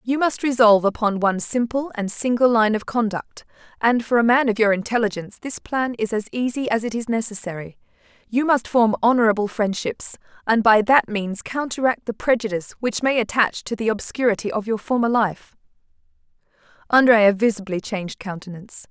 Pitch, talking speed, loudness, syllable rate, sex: 225 Hz, 170 wpm, -20 LUFS, 5.5 syllables/s, female